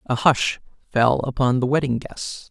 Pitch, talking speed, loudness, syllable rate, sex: 125 Hz, 170 wpm, -21 LUFS, 4.3 syllables/s, male